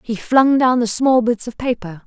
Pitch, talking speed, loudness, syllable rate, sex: 235 Hz, 230 wpm, -16 LUFS, 4.6 syllables/s, female